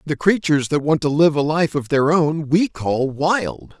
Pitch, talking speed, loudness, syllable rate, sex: 155 Hz, 220 wpm, -18 LUFS, 4.3 syllables/s, male